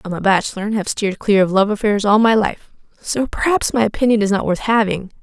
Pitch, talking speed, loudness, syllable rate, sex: 210 Hz, 240 wpm, -17 LUFS, 6.1 syllables/s, female